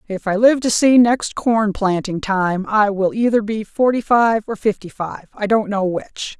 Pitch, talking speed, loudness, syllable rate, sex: 210 Hz, 205 wpm, -17 LUFS, 4.3 syllables/s, female